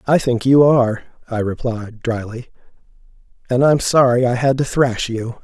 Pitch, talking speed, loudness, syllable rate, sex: 125 Hz, 165 wpm, -17 LUFS, 4.7 syllables/s, male